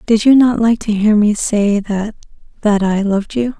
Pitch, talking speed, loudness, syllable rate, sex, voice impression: 215 Hz, 185 wpm, -14 LUFS, 4.7 syllables/s, female, feminine, adult-like, slightly soft, calm, slightly friendly, slightly reassuring, kind